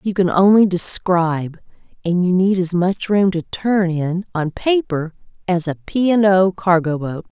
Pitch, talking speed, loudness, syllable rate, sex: 185 Hz, 180 wpm, -17 LUFS, 4.3 syllables/s, female